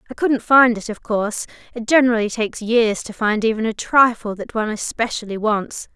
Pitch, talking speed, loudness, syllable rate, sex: 225 Hz, 180 wpm, -19 LUFS, 5.6 syllables/s, female